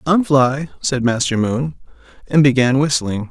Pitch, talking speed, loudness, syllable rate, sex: 130 Hz, 145 wpm, -16 LUFS, 4.2 syllables/s, male